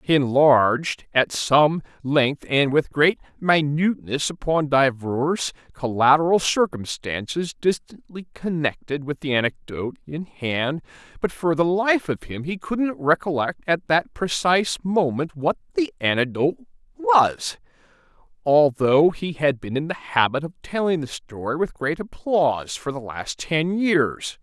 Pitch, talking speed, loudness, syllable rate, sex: 155 Hz, 140 wpm, -22 LUFS, 4.1 syllables/s, male